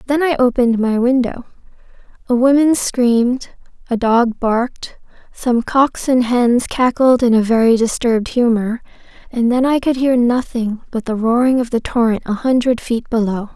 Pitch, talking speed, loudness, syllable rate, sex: 240 Hz, 160 wpm, -15 LUFS, 4.7 syllables/s, female